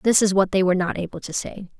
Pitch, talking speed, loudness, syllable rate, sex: 190 Hz, 300 wpm, -21 LUFS, 6.7 syllables/s, female